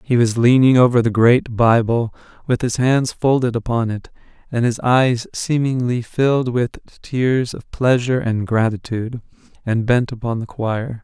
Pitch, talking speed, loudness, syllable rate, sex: 120 Hz, 160 wpm, -18 LUFS, 4.4 syllables/s, male